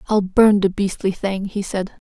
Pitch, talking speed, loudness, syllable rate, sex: 195 Hz, 200 wpm, -19 LUFS, 4.4 syllables/s, female